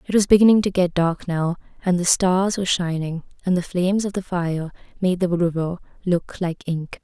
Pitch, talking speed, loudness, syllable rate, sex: 180 Hz, 205 wpm, -21 LUFS, 5.1 syllables/s, female